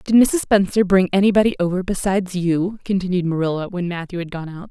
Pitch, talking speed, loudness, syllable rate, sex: 185 Hz, 190 wpm, -19 LUFS, 6.1 syllables/s, female